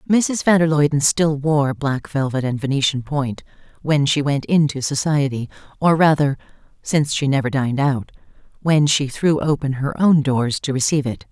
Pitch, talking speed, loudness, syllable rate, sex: 145 Hz, 170 wpm, -19 LUFS, 4.5 syllables/s, female